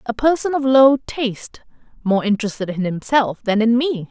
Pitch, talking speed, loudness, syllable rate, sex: 235 Hz, 175 wpm, -18 LUFS, 5.1 syllables/s, female